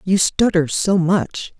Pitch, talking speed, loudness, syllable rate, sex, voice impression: 180 Hz, 150 wpm, -17 LUFS, 3.4 syllables/s, female, feminine, adult-like, tensed, powerful, bright, slightly soft, clear, intellectual, calm, friendly, reassuring, elegant, lively, kind, slightly modest